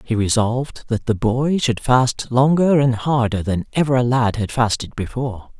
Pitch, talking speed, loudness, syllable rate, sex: 120 Hz, 180 wpm, -19 LUFS, 4.7 syllables/s, male